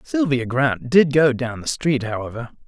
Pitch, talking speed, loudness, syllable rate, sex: 135 Hz, 180 wpm, -19 LUFS, 4.5 syllables/s, male